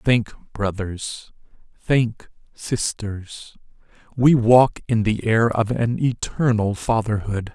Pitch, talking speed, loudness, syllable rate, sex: 110 Hz, 105 wpm, -20 LUFS, 3.1 syllables/s, male